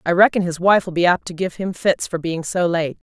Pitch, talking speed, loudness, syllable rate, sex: 175 Hz, 270 wpm, -19 LUFS, 5.5 syllables/s, female